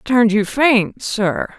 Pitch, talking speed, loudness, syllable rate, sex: 225 Hz, 150 wpm, -16 LUFS, 3.4 syllables/s, female